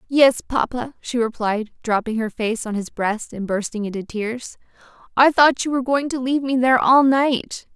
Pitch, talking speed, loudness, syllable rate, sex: 240 Hz, 195 wpm, -20 LUFS, 4.9 syllables/s, female